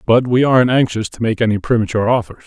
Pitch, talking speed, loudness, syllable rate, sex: 115 Hz, 220 wpm, -15 LUFS, 6.9 syllables/s, male